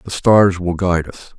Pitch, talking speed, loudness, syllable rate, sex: 90 Hz, 215 wpm, -15 LUFS, 5.0 syllables/s, male